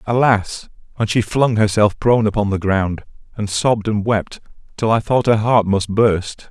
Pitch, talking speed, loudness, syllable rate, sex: 105 Hz, 185 wpm, -17 LUFS, 4.6 syllables/s, male